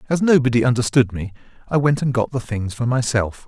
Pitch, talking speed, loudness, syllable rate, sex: 125 Hz, 205 wpm, -19 LUFS, 5.8 syllables/s, male